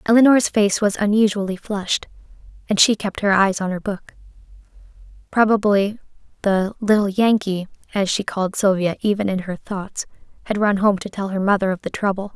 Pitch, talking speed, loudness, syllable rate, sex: 200 Hz, 170 wpm, -19 LUFS, 5.4 syllables/s, female